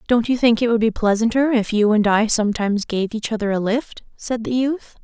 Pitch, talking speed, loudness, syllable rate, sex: 225 Hz, 240 wpm, -19 LUFS, 5.5 syllables/s, female